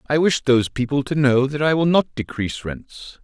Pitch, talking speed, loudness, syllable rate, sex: 135 Hz, 225 wpm, -19 LUFS, 5.2 syllables/s, male